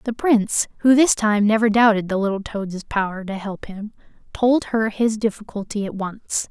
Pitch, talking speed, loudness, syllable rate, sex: 215 Hz, 185 wpm, -20 LUFS, 4.8 syllables/s, female